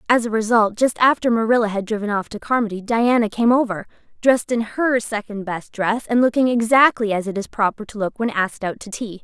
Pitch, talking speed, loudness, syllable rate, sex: 220 Hz, 220 wpm, -19 LUFS, 5.8 syllables/s, female